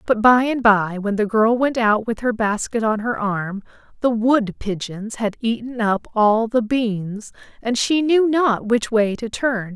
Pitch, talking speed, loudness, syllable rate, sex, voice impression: 225 Hz, 195 wpm, -19 LUFS, 4.0 syllables/s, female, very feminine, very adult-like, middle-aged, slightly tensed, dark, hard, clear, very fluent, slightly cool, intellectual, refreshing, sincere, calm, friendly, reassuring, slightly unique, elegant, slightly wild, slightly sweet, slightly lively, slightly strict, sharp